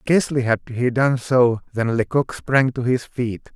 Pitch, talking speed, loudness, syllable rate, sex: 125 Hz, 185 wpm, -20 LUFS, 4.4 syllables/s, male